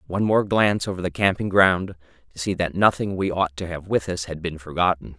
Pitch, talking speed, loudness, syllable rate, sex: 90 Hz, 230 wpm, -22 LUFS, 5.7 syllables/s, male